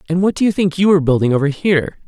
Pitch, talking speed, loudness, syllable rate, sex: 170 Hz, 290 wpm, -15 LUFS, 7.6 syllables/s, male